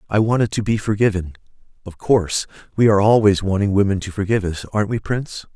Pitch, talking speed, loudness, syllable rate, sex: 105 Hz, 185 wpm, -18 LUFS, 6.8 syllables/s, male